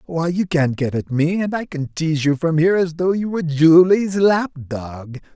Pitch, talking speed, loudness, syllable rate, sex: 165 Hz, 215 wpm, -18 LUFS, 4.7 syllables/s, male